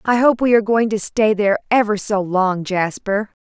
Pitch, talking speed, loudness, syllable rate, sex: 210 Hz, 210 wpm, -17 LUFS, 5.1 syllables/s, female